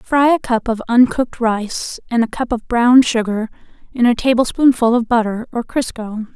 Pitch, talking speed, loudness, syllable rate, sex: 235 Hz, 180 wpm, -16 LUFS, 4.8 syllables/s, female